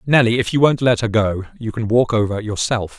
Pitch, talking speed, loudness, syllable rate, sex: 115 Hz, 240 wpm, -18 LUFS, 5.5 syllables/s, male